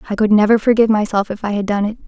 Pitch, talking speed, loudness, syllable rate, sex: 210 Hz, 290 wpm, -15 LUFS, 7.7 syllables/s, female